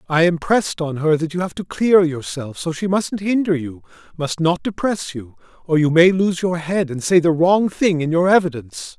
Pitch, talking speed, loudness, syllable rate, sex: 170 Hz, 220 wpm, -18 LUFS, 5.0 syllables/s, male